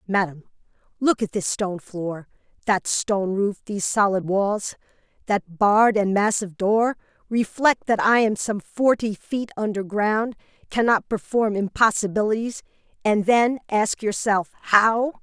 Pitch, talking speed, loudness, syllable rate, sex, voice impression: 210 Hz, 130 wpm, -22 LUFS, 4.5 syllables/s, female, feminine, tensed, slightly bright, clear, slightly unique, slightly lively